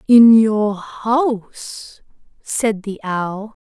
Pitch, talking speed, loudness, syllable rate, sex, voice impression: 215 Hz, 100 wpm, -16 LUFS, 2.3 syllables/s, female, gender-neutral, very young, tensed, powerful, bright, soft, very halting, cute, friendly, unique